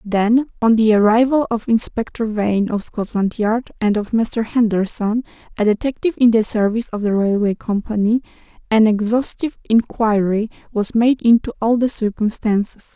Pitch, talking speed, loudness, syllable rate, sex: 220 Hz, 150 wpm, -18 LUFS, 5.0 syllables/s, female